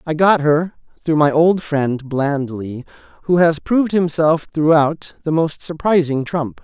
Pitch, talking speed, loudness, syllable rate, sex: 155 Hz, 155 wpm, -17 LUFS, 4.0 syllables/s, male